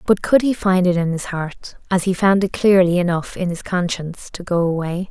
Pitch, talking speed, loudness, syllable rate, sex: 180 Hz, 210 wpm, -18 LUFS, 5.2 syllables/s, female